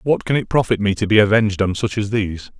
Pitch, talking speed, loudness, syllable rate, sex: 105 Hz, 280 wpm, -18 LUFS, 6.5 syllables/s, male